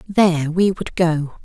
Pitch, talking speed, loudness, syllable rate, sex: 170 Hz, 165 wpm, -18 LUFS, 4.1 syllables/s, female